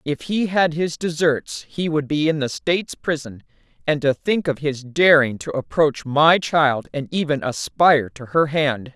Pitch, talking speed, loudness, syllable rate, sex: 150 Hz, 190 wpm, -20 LUFS, 4.3 syllables/s, female